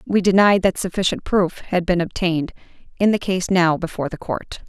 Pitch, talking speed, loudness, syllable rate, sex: 180 Hz, 190 wpm, -19 LUFS, 5.5 syllables/s, female